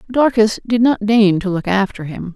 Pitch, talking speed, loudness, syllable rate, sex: 215 Hz, 205 wpm, -15 LUFS, 4.8 syllables/s, female